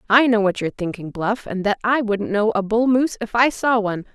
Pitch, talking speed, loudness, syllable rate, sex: 215 Hz, 260 wpm, -20 LUFS, 5.8 syllables/s, female